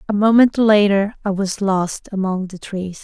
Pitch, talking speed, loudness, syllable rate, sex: 200 Hz, 180 wpm, -17 LUFS, 4.4 syllables/s, female